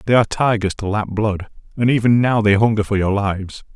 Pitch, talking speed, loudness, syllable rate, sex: 105 Hz, 225 wpm, -17 LUFS, 5.9 syllables/s, male